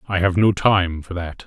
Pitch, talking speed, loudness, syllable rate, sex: 90 Hz, 245 wpm, -19 LUFS, 4.7 syllables/s, male